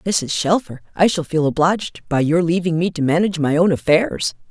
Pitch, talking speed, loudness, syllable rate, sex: 165 Hz, 200 wpm, -18 LUFS, 5.3 syllables/s, female